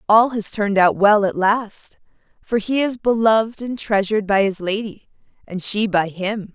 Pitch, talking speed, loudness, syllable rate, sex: 210 Hz, 185 wpm, -19 LUFS, 4.7 syllables/s, female